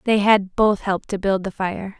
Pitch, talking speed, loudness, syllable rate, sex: 200 Hz, 240 wpm, -20 LUFS, 4.9 syllables/s, female